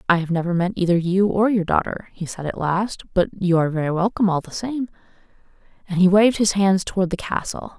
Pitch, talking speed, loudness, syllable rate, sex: 190 Hz, 225 wpm, -20 LUFS, 6.1 syllables/s, female